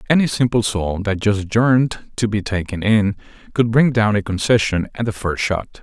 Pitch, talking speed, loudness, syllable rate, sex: 105 Hz, 195 wpm, -18 LUFS, 4.6 syllables/s, male